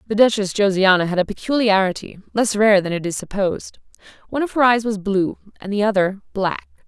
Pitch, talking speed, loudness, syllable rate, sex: 205 Hz, 190 wpm, -19 LUFS, 5.9 syllables/s, female